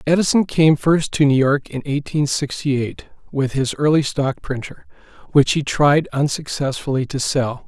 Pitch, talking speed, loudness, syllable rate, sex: 140 Hz, 165 wpm, -19 LUFS, 4.6 syllables/s, male